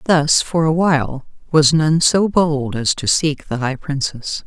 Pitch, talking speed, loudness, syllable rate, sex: 150 Hz, 190 wpm, -16 LUFS, 3.9 syllables/s, female